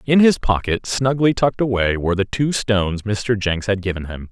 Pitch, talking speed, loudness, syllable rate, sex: 105 Hz, 210 wpm, -19 LUFS, 5.3 syllables/s, male